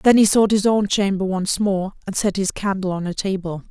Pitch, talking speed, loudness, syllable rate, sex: 195 Hz, 245 wpm, -20 LUFS, 5.2 syllables/s, female